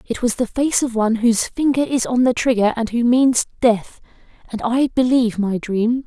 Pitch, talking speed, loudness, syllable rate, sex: 240 Hz, 210 wpm, -18 LUFS, 5.2 syllables/s, female